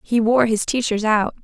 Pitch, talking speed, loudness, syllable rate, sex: 225 Hz, 210 wpm, -18 LUFS, 4.7 syllables/s, female